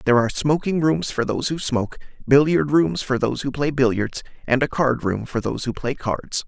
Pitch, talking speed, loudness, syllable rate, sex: 135 Hz, 220 wpm, -21 LUFS, 5.7 syllables/s, male